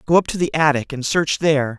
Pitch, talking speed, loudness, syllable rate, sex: 150 Hz, 270 wpm, -18 LUFS, 6.0 syllables/s, male